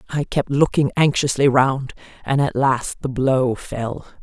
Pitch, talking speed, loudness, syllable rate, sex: 130 Hz, 155 wpm, -19 LUFS, 4.0 syllables/s, female